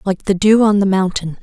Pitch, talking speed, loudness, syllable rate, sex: 195 Hz, 250 wpm, -14 LUFS, 5.4 syllables/s, female